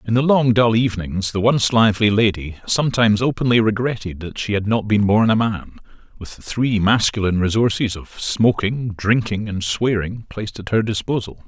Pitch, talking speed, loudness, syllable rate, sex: 105 Hz, 175 wpm, -18 LUFS, 5.3 syllables/s, male